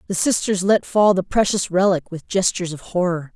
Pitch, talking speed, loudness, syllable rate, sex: 185 Hz, 195 wpm, -19 LUFS, 5.4 syllables/s, female